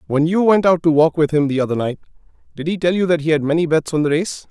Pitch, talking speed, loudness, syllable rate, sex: 160 Hz, 305 wpm, -17 LUFS, 6.6 syllables/s, male